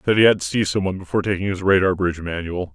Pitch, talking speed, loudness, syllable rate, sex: 95 Hz, 265 wpm, -20 LUFS, 7.6 syllables/s, male